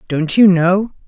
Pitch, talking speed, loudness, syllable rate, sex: 185 Hz, 170 wpm, -13 LUFS, 3.7 syllables/s, female